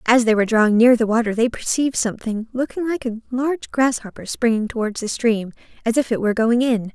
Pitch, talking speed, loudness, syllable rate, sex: 235 Hz, 215 wpm, -19 LUFS, 6.1 syllables/s, female